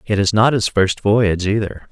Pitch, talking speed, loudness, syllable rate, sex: 105 Hz, 220 wpm, -16 LUFS, 5.0 syllables/s, male